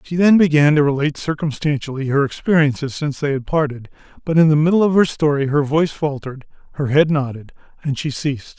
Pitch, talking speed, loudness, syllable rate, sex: 145 Hz, 195 wpm, -17 LUFS, 6.3 syllables/s, male